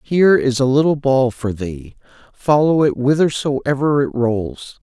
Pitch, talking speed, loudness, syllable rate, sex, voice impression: 140 Hz, 150 wpm, -17 LUFS, 4.2 syllables/s, male, masculine, adult-like, slightly thick, tensed, powerful, slightly hard, clear, intellectual, slightly friendly, wild, lively, slightly strict, slightly intense